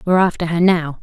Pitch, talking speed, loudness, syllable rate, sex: 170 Hz, 235 wpm, -16 LUFS, 6.6 syllables/s, female